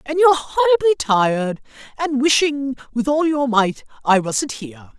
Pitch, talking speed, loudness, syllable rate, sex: 270 Hz, 155 wpm, -18 LUFS, 4.7 syllables/s, female